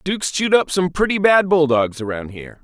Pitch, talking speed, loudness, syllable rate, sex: 160 Hz, 205 wpm, -17 LUFS, 5.9 syllables/s, male